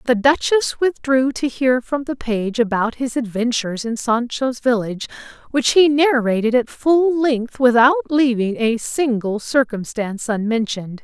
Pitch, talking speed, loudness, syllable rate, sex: 245 Hz, 140 wpm, -18 LUFS, 4.5 syllables/s, female